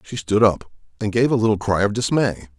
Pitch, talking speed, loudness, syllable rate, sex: 105 Hz, 230 wpm, -19 LUFS, 6.0 syllables/s, male